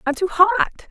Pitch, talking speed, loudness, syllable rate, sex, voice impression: 345 Hz, 200 wpm, -18 LUFS, 5.1 syllables/s, female, feminine, adult-like, tensed, bright, clear, fluent, intellectual, slightly calm, elegant, lively, slightly strict, slightly sharp